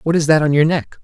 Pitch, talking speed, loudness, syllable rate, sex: 150 Hz, 350 wpm, -15 LUFS, 6.3 syllables/s, male